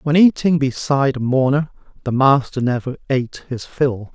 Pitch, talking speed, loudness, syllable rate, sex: 135 Hz, 160 wpm, -18 LUFS, 5.0 syllables/s, male